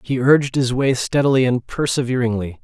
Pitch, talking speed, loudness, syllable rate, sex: 130 Hz, 160 wpm, -18 LUFS, 5.5 syllables/s, male